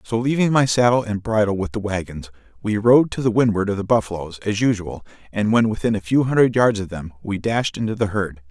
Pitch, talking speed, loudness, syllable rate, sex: 110 Hz, 235 wpm, -20 LUFS, 5.7 syllables/s, male